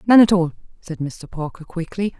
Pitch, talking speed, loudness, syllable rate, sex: 180 Hz, 190 wpm, -20 LUFS, 5.2 syllables/s, female